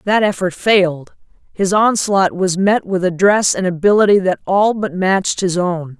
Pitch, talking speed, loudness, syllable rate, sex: 190 Hz, 170 wpm, -15 LUFS, 4.6 syllables/s, female